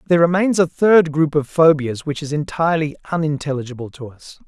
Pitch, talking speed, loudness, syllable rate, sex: 155 Hz, 175 wpm, -17 LUFS, 5.9 syllables/s, male